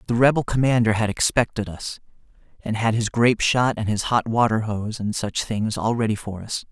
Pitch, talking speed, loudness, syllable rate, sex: 110 Hz, 205 wpm, -22 LUFS, 5.3 syllables/s, male